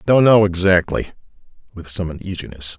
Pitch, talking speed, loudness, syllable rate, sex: 90 Hz, 130 wpm, -17 LUFS, 5.3 syllables/s, male